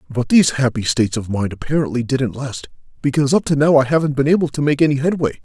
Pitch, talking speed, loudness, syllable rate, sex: 135 Hz, 230 wpm, -17 LUFS, 6.8 syllables/s, male